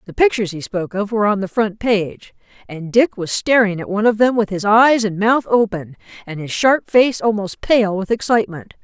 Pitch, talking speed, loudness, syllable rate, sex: 210 Hz, 215 wpm, -17 LUFS, 5.4 syllables/s, female